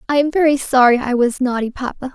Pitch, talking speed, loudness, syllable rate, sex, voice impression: 260 Hz, 225 wpm, -16 LUFS, 6.1 syllables/s, female, very feminine, slightly young, slightly adult-like, thin, tensed, powerful, bright, very hard, very clear, very fluent, slightly raspy, very cool, intellectual, very refreshing, sincere, slightly calm, slightly friendly, very reassuring, unique, slightly elegant, very wild, slightly sweet, lively, strict, intense, sharp